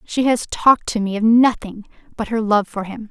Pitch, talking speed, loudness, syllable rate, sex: 220 Hz, 230 wpm, -17 LUFS, 5.2 syllables/s, female